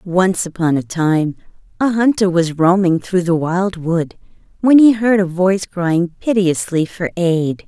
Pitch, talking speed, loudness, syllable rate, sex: 180 Hz, 155 wpm, -16 LUFS, 4.1 syllables/s, female